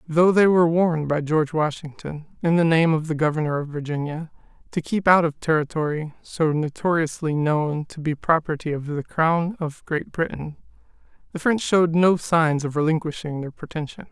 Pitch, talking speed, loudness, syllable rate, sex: 160 Hz, 175 wpm, -22 LUFS, 5.2 syllables/s, male